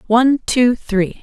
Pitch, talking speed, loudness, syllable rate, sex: 235 Hz, 145 wpm, -16 LUFS, 3.7 syllables/s, female